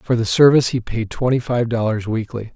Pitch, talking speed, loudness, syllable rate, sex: 120 Hz, 210 wpm, -18 LUFS, 5.6 syllables/s, male